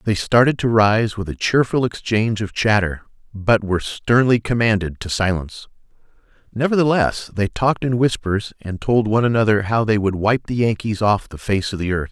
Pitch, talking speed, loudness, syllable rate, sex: 110 Hz, 185 wpm, -19 LUFS, 5.4 syllables/s, male